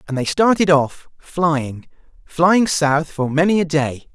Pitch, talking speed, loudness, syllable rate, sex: 160 Hz, 160 wpm, -17 LUFS, 3.7 syllables/s, male